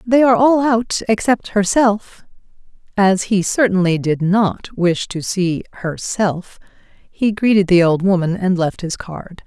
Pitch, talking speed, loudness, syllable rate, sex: 200 Hz, 145 wpm, -16 LUFS, 4.0 syllables/s, female